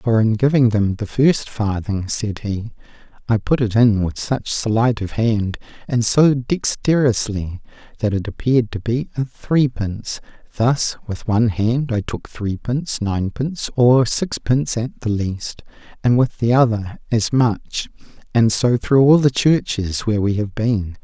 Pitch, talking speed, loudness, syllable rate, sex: 115 Hz, 165 wpm, -19 LUFS, 4.2 syllables/s, male